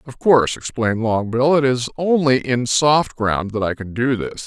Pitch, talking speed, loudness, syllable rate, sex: 125 Hz, 200 wpm, -18 LUFS, 4.7 syllables/s, male